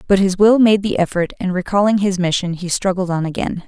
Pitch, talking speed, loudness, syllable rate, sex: 190 Hz, 230 wpm, -17 LUFS, 5.8 syllables/s, female